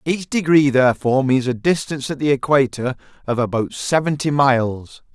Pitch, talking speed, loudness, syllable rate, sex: 135 Hz, 150 wpm, -18 LUFS, 5.4 syllables/s, male